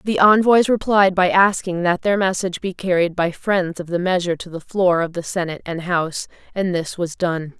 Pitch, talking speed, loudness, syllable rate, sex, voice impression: 180 Hz, 215 wpm, -19 LUFS, 5.3 syllables/s, female, feminine, adult-like, slightly fluent, intellectual, slightly calm, slightly strict